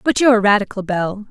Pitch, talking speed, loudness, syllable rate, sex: 210 Hz, 230 wpm, -16 LUFS, 6.6 syllables/s, female